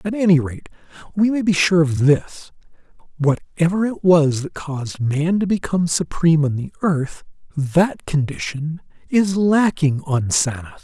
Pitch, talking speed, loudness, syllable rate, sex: 165 Hz, 150 wpm, -19 LUFS, 4.4 syllables/s, male